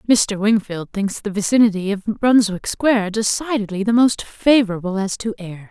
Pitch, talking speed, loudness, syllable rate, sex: 210 Hz, 160 wpm, -18 LUFS, 4.9 syllables/s, female